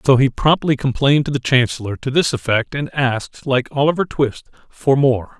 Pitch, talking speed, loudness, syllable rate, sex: 130 Hz, 190 wpm, -17 LUFS, 5.1 syllables/s, male